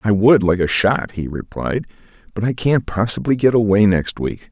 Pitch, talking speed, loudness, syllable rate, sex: 105 Hz, 200 wpm, -17 LUFS, 4.9 syllables/s, male